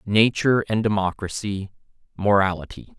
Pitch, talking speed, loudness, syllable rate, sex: 105 Hz, 60 wpm, -22 LUFS, 4.9 syllables/s, male